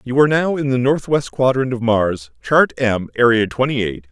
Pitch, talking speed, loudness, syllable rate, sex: 125 Hz, 205 wpm, -17 LUFS, 5.1 syllables/s, male